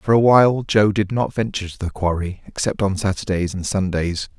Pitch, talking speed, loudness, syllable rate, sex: 100 Hz, 205 wpm, -20 LUFS, 5.4 syllables/s, male